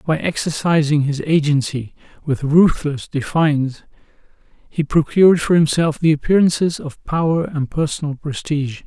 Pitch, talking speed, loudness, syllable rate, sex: 150 Hz, 120 wpm, -18 LUFS, 4.9 syllables/s, male